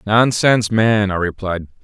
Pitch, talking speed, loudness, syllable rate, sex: 105 Hz, 130 wpm, -16 LUFS, 4.5 syllables/s, male